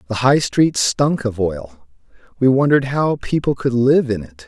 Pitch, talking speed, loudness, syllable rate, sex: 125 Hz, 190 wpm, -17 LUFS, 4.6 syllables/s, male